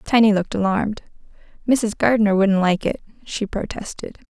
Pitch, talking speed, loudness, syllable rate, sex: 210 Hz, 155 wpm, -20 LUFS, 6.0 syllables/s, female